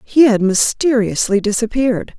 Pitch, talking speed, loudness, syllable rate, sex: 225 Hz, 110 wpm, -15 LUFS, 4.8 syllables/s, female